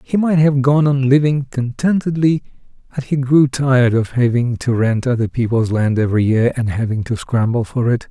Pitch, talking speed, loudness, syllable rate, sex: 130 Hz, 190 wpm, -16 LUFS, 5.1 syllables/s, male